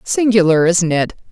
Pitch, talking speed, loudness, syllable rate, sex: 185 Hz, 135 wpm, -14 LUFS, 4.8 syllables/s, female